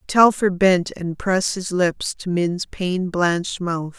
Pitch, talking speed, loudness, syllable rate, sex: 180 Hz, 165 wpm, -20 LUFS, 3.7 syllables/s, female